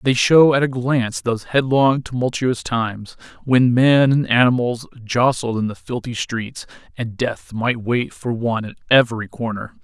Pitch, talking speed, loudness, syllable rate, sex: 120 Hz, 165 wpm, -18 LUFS, 4.7 syllables/s, male